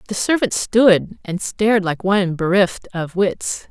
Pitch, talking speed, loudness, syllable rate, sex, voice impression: 195 Hz, 160 wpm, -18 LUFS, 4.1 syllables/s, female, feminine, adult-like, slightly clear, slightly intellectual, elegant